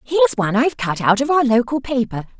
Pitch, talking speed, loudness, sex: 255 Hz, 250 wpm, -18 LUFS, female